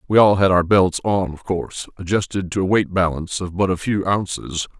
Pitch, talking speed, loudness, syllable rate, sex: 95 Hz, 225 wpm, -19 LUFS, 5.5 syllables/s, male